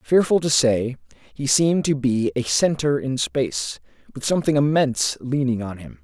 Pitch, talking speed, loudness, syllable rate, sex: 130 Hz, 170 wpm, -21 LUFS, 5.0 syllables/s, male